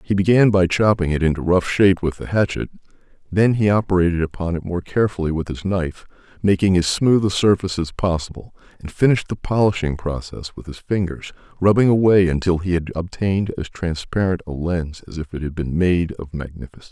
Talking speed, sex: 195 wpm, male